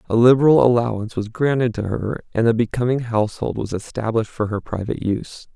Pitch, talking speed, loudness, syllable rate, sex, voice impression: 115 Hz, 185 wpm, -20 LUFS, 6.3 syllables/s, male, masculine, adult-like, cool, slightly intellectual, calm, reassuring, slightly elegant